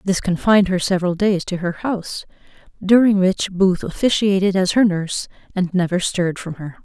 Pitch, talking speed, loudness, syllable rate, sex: 190 Hz, 175 wpm, -18 LUFS, 5.5 syllables/s, female